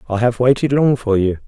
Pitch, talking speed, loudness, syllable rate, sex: 120 Hz, 245 wpm, -16 LUFS, 5.7 syllables/s, male